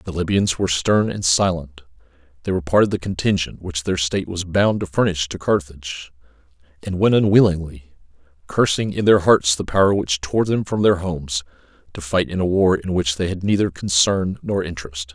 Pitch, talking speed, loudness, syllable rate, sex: 85 Hz, 195 wpm, -19 LUFS, 5.4 syllables/s, male